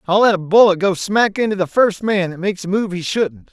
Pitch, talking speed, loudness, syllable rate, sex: 190 Hz, 275 wpm, -16 LUFS, 5.7 syllables/s, male